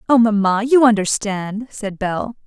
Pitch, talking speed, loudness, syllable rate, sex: 215 Hz, 145 wpm, -17 LUFS, 4.1 syllables/s, female